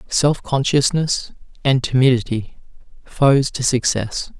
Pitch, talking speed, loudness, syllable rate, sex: 130 Hz, 95 wpm, -18 LUFS, 3.8 syllables/s, male